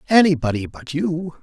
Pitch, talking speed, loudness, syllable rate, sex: 155 Hz, 125 wpm, -20 LUFS, 5.0 syllables/s, male